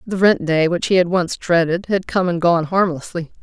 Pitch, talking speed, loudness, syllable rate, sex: 175 Hz, 230 wpm, -17 LUFS, 5.0 syllables/s, female